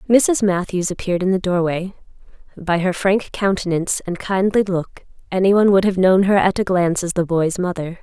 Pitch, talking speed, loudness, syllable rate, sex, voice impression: 185 Hz, 185 wpm, -18 LUFS, 5.3 syllables/s, female, feminine, slightly gender-neutral, slightly young, slightly adult-like, slightly thin, slightly relaxed, slightly weak, slightly bright, very soft, slightly clear, fluent, cute, intellectual, refreshing, very calm, friendly, reassuring, unique, elegant, sweet, slightly lively, very kind, slightly modest